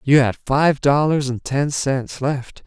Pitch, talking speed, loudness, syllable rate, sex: 140 Hz, 180 wpm, -19 LUFS, 3.5 syllables/s, male